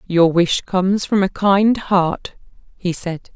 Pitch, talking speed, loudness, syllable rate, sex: 185 Hz, 160 wpm, -17 LUFS, 3.6 syllables/s, female